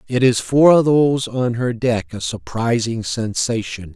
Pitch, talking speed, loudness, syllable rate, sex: 120 Hz, 150 wpm, -18 LUFS, 4.0 syllables/s, male